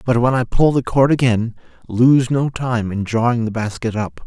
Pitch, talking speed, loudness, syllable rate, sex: 120 Hz, 210 wpm, -17 LUFS, 4.7 syllables/s, male